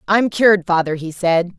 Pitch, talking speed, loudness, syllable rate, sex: 185 Hz, 190 wpm, -16 LUFS, 5.1 syllables/s, female